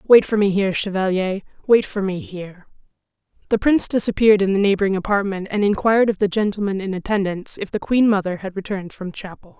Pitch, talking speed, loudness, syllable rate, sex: 200 Hz, 195 wpm, -19 LUFS, 6.5 syllables/s, female